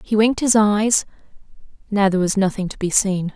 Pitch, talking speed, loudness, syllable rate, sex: 200 Hz, 195 wpm, -18 LUFS, 5.8 syllables/s, female